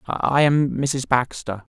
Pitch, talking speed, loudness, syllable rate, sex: 130 Hz, 135 wpm, -20 LUFS, 3.2 syllables/s, male